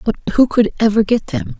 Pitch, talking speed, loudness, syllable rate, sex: 200 Hz, 225 wpm, -15 LUFS, 5.8 syllables/s, male